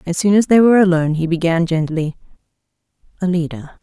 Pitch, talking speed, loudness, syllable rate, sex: 175 Hz, 155 wpm, -16 LUFS, 6.6 syllables/s, female